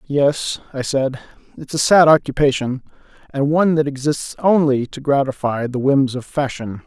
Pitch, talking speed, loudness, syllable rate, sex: 140 Hz, 155 wpm, -18 LUFS, 4.7 syllables/s, male